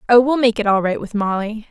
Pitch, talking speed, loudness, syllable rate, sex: 225 Hz, 280 wpm, -17 LUFS, 5.9 syllables/s, female